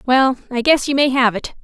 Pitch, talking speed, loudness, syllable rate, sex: 260 Hz, 260 wpm, -16 LUFS, 5.2 syllables/s, female